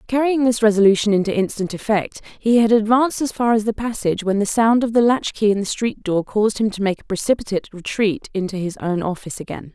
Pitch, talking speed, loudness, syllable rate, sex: 215 Hz, 230 wpm, -19 LUFS, 6.1 syllables/s, female